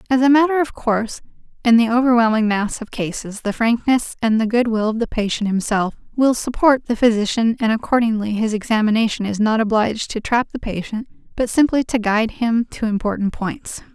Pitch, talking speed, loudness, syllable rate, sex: 225 Hz, 190 wpm, -18 LUFS, 5.6 syllables/s, female